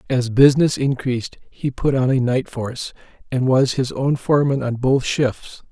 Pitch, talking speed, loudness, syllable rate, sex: 130 Hz, 180 wpm, -19 LUFS, 4.8 syllables/s, male